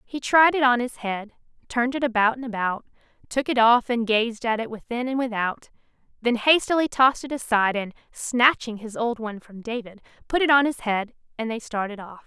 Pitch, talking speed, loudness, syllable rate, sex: 235 Hz, 205 wpm, -23 LUFS, 5.5 syllables/s, female